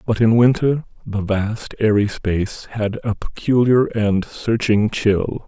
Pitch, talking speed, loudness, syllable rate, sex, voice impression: 110 Hz, 140 wpm, -19 LUFS, 3.8 syllables/s, male, masculine, middle-aged, thick, cool, calm, slightly wild